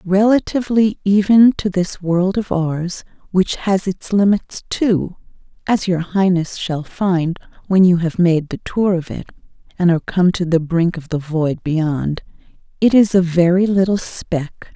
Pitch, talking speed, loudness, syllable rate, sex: 180 Hz, 165 wpm, -17 LUFS, 3.3 syllables/s, female